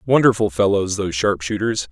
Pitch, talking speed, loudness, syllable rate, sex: 100 Hz, 125 wpm, -19 LUFS, 5.6 syllables/s, male